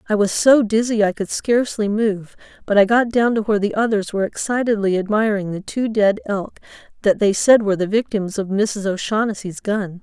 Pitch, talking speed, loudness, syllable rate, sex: 210 Hz, 200 wpm, -18 LUFS, 5.4 syllables/s, female